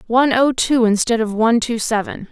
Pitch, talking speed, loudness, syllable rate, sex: 235 Hz, 210 wpm, -16 LUFS, 5.6 syllables/s, female